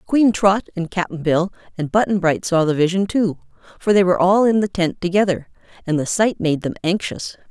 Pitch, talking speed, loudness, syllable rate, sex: 185 Hz, 210 wpm, -19 LUFS, 5.3 syllables/s, female